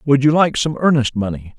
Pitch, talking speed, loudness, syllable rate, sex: 135 Hz, 225 wpm, -16 LUFS, 5.6 syllables/s, male